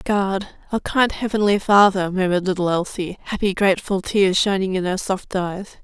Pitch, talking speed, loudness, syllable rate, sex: 195 Hz, 165 wpm, -20 LUFS, 5.0 syllables/s, female